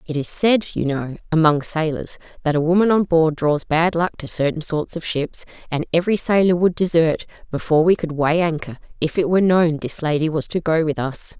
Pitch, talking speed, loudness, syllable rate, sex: 160 Hz, 215 wpm, -19 LUFS, 5.4 syllables/s, female